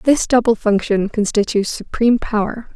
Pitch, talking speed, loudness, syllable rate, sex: 220 Hz, 130 wpm, -17 LUFS, 5.2 syllables/s, female